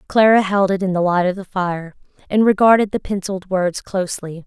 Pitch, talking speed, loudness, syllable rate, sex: 190 Hz, 200 wpm, -17 LUFS, 5.5 syllables/s, female